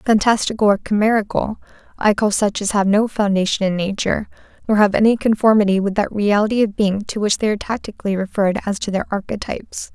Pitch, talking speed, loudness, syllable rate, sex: 205 Hz, 185 wpm, -18 LUFS, 6.1 syllables/s, female